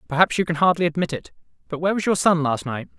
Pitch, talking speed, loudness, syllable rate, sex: 165 Hz, 260 wpm, -21 LUFS, 7.2 syllables/s, male